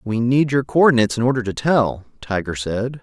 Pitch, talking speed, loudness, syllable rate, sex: 120 Hz, 220 wpm, -18 LUFS, 5.8 syllables/s, male